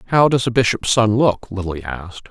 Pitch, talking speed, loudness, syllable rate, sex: 110 Hz, 210 wpm, -17 LUFS, 4.5 syllables/s, male